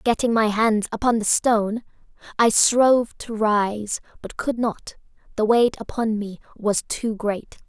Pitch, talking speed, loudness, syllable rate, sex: 220 Hz, 155 wpm, -21 LUFS, 4.1 syllables/s, female